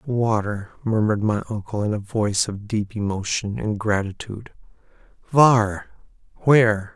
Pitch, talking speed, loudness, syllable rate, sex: 105 Hz, 120 wpm, -21 LUFS, 4.9 syllables/s, male